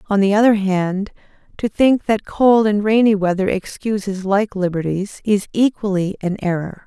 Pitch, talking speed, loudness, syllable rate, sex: 200 Hz, 155 wpm, -18 LUFS, 4.6 syllables/s, female